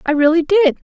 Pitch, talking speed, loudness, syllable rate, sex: 325 Hz, 195 wpm, -14 LUFS, 5.7 syllables/s, female